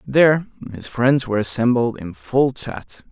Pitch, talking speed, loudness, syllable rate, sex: 125 Hz, 155 wpm, -19 LUFS, 4.5 syllables/s, male